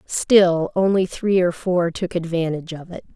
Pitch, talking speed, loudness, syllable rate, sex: 175 Hz, 170 wpm, -19 LUFS, 4.5 syllables/s, female